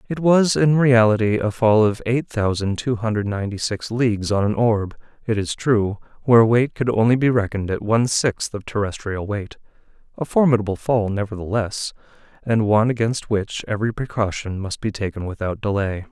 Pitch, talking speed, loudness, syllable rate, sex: 110 Hz, 175 wpm, -20 LUFS, 5.4 syllables/s, male